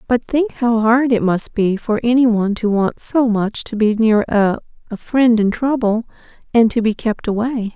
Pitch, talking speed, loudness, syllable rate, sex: 225 Hz, 200 wpm, -16 LUFS, 4.6 syllables/s, female